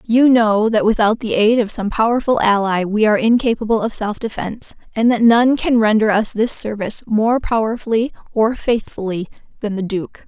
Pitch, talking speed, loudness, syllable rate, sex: 220 Hz, 180 wpm, -16 LUFS, 5.2 syllables/s, female